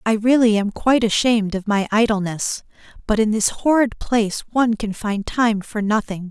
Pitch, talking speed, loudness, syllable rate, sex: 220 Hz, 180 wpm, -19 LUFS, 5.2 syllables/s, female